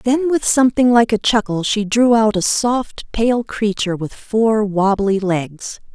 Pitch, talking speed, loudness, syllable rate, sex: 220 Hz, 170 wpm, -16 LUFS, 4.0 syllables/s, female